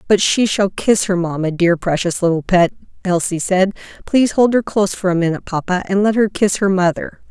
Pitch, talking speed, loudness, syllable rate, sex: 190 Hz, 215 wpm, -16 LUFS, 5.6 syllables/s, female